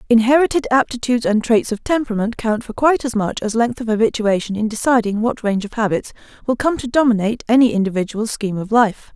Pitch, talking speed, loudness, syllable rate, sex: 230 Hz, 195 wpm, -18 LUFS, 6.4 syllables/s, female